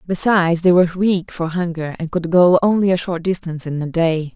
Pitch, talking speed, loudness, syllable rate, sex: 175 Hz, 220 wpm, -17 LUFS, 5.7 syllables/s, female